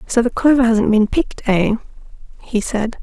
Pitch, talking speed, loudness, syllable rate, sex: 230 Hz, 180 wpm, -17 LUFS, 5.1 syllables/s, female